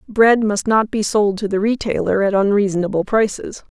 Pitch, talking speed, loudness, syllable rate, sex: 205 Hz, 175 wpm, -17 LUFS, 5.1 syllables/s, female